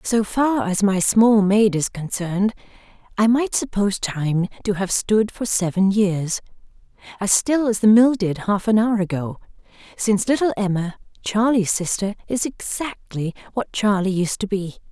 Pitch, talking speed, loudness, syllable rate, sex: 205 Hz, 160 wpm, -20 LUFS, 4.5 syllables/s, female